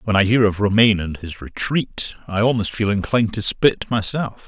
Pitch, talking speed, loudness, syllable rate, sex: 105 Hz, 200 wpm, -19 LUFS, 5.2 syllables/s, male